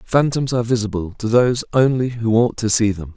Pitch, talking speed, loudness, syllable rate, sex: 115 Hz, 210 wpm, -18 LUFS, 5.7 syllables/s, male